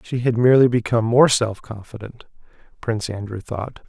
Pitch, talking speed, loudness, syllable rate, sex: 115 Hz, 155 wpm, -19 LUFS, 5.6 syllables/s, male